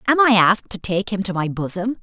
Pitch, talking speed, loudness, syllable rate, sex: 205 Hz, 265 wpm, -19 LUFS, 6.4 syllables/s, female